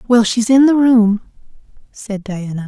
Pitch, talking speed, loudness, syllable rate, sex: 225 Hz, 155 wpm, -14 LUFS, 4.4 syllables/s, female